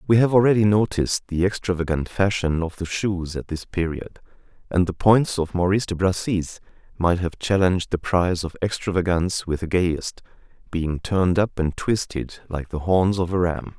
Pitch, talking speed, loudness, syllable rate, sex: 90 Hz, 180 wpm, -22 LUFS, 5.1 syllables/s, male